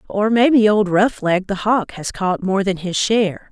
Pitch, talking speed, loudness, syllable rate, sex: 200 Hz, 220 wpm, -17 LUFS, 4.5 syllables/s, female